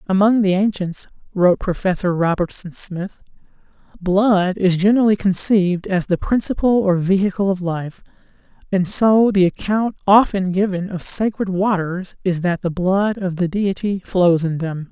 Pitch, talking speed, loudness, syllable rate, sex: 190 Hz, 150 wpm, -18 LUFS, 4.6 syllables/s, female